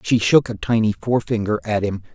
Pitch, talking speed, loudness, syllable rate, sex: 110 Hz, 195 wpm, -19 LUFS, 5.6 syllables/s, male